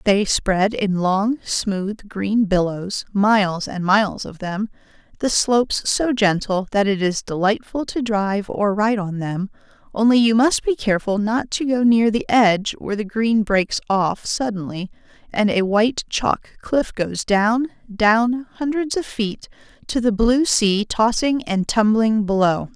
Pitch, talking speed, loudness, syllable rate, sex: 215 Hz, 165 wpm, -19 LUFS, 4.1 syllables/s, female